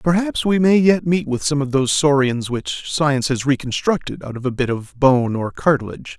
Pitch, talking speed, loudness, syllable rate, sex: 140 Hz, 215 wpm, -18 LUFS, 5.3 syllables/s, male